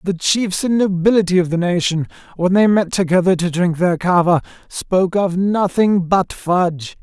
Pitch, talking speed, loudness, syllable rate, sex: 180 Hz, 170 wpm, -16 LUFS, 4.8 syllables/s, male